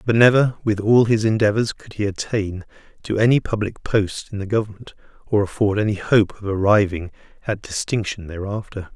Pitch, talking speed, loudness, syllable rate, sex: 105 Hz, 165 wpm, -20 LUFS, 5.4 syllables/s, male